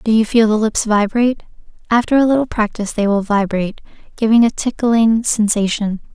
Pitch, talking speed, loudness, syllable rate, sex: 220 Hz, 165 wpm, -16 LUFS, 5.7 syllables/s, female